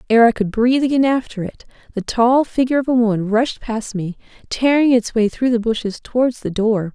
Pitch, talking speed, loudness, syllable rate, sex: 235 Hz, 215 wpm, -17 LUFS, 5.6 syllables/s, female